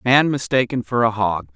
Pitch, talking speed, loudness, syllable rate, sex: 115 Hz, 230 wpm, -19 LUFS, 5.7 syllables/s, male